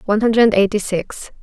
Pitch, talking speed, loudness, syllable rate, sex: 210 Hz, 170 wpm, -16 LUFS, 5.8 syllables/s, female